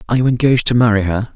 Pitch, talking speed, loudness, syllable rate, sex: 115 Hz, 265 wpm, -14 LUFS, 8.5 syllables/s, male